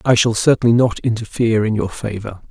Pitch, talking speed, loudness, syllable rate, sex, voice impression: 110 Hz, 190 wpm, -17 LUFS, 5.9 syllables/s, male, masculine, middle-aged, powerful, slightly weak, fluent, slightly raspy, intellectual, mature, friendly, reassuring, wild, lively, slightly kind